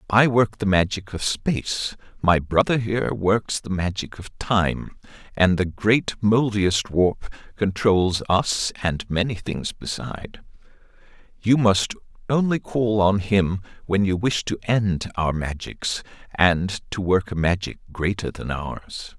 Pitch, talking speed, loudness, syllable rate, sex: 100 Hz, 140 wpm, -22 LUFS, 3.8 syllables/s, male